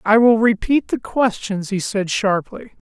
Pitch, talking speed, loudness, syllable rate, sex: 215 Hz, 165 wpm, -18 LUFS, 4.1 syllables/s, male